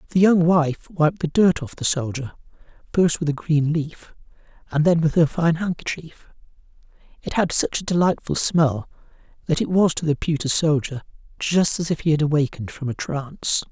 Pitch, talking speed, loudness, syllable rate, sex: 155 Hz, 180 wpm, -21 LUFS, 5.0 syllables/s, male